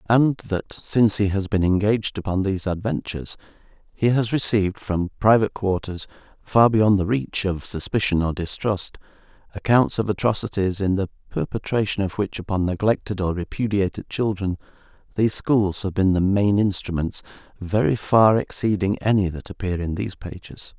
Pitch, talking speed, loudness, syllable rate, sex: 100 Hz, 155 wpm, -22 LUFS, 5.2 syllables/s, male